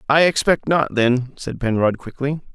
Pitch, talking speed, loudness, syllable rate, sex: 135 Hz, 165 wpm, -19 LUFS, 4.5 syllables/s, male